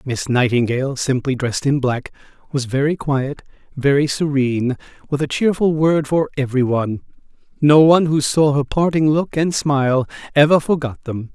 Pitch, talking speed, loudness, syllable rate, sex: 140 Hz, 155 wpm, -18 LUFS, 5.1 syllables/s, male